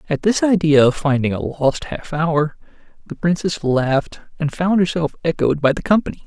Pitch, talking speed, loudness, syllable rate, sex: 160 Hz, 180 wpm, -18 LUFS, 5.1 syllables/s, male